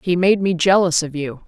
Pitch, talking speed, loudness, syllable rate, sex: 175 Hz, 245 wpm, -17 LUFS, 5.2 syllables/s, female